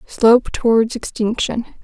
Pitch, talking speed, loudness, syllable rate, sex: 230 Hz, 100 wpm, -17 LUFS, 4.5 syllables/s, female